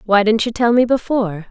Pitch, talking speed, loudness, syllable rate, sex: 220 Hz, 240 wpm, -16 LUFS, 6.0 syllables/s, female